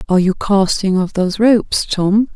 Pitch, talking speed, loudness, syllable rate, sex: 200 Hz, 180 wpm, -15 LUFS, 5.2 syllables/s, female